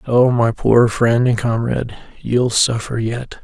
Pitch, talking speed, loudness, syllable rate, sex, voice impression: 120 Hz, 155 wpm, -16 LUFS, 3.8 syllables/s, male, masculine, middle-aged, relaxed, slightly weak, slightly soft, raspy, calm, mature, friendly, reassuring, wild, kind, modest